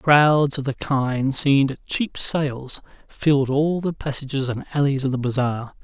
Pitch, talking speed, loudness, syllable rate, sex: 140 Hz, 175 wpm, -21 LUFS, 4.1 syllables/s, male